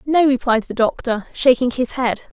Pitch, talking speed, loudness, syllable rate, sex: 250 Hz, 175 wpm, -18 LUFS, 4.6 syllables/s, female